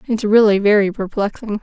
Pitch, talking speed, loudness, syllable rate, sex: 210 Hz, 145 wpm, -16 LUFS, 5.4 syllables/s, female